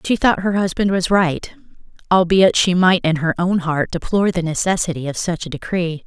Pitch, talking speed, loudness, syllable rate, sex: 175 Hz, 200 wpm, -17 LUFS, 5.2 syllables/s, female